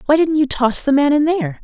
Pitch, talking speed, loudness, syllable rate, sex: 285 Hz, 295 wpm, -16 LUFS, 6.2 syllables/s, female